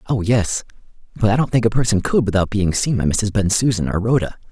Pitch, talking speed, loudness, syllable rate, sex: 105 Hz, 225 wpm, -18 LUFS, 5.9 syllables/s, male